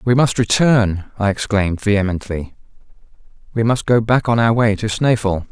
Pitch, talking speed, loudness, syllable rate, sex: 110 Hz, 165 wpm, -17 LUFS, 5.1 syllables/s, male